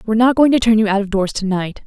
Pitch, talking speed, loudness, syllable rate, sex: 215 Hz, 355 wpm, -15 LUFS, 7.1 syllables/s, female